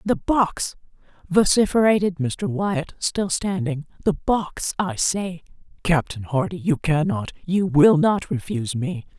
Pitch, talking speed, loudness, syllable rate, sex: 180 Hz, 125 wpm, -22 LUFS, 3.9 syllables/s, female